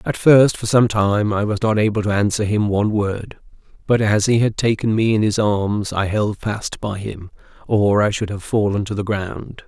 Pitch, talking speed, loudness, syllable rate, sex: 105 Hz, 225 wpm, -18 LUFS, 4.7 syllables/s, male